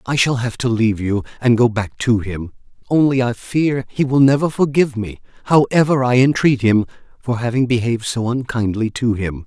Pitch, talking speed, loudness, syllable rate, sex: 120 Hz, 190 wpm, -17 LUFS, 5.2 syllables/s, male